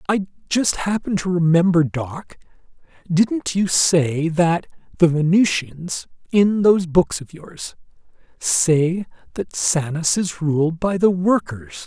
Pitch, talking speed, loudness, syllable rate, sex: 170 Hz, 125 wpm, -19 LUFS, 3.7 syllables/s, male